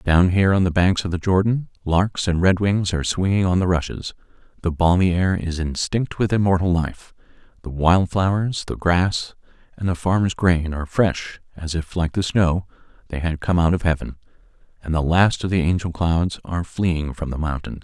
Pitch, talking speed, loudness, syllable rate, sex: 90 Hz, 195 wpm, -21 LUFS, 5.0 syllables/s, male